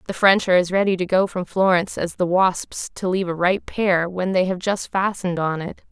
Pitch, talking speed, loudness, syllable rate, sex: 185 Hz, 245 wpm, -20 LUFS, 5.5 syllables/s, female